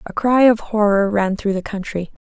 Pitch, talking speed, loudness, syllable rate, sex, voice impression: 205 Hz, 210 wpm, -18 LUFS, 4.9 syllables/s, female, feminine, young, relaxed, soft, raspy, slightly cute, refreshing, calm, slightly friendly, reassuring, kind, modest